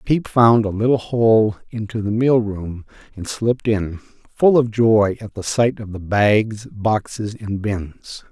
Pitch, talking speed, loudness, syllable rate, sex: 110 Hz, 175 wpm, -18 LUFS, 3.7 syllables/s, male